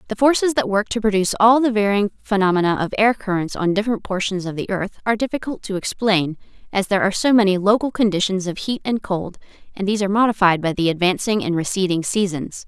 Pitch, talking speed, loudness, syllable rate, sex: 200 Hz, 210 wpm, -19 LUFS, 6.4 syllables/s, female